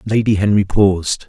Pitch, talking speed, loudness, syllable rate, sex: 100 Hz, 140 wpm, -15 LUFS, 5.2 syllables/s, male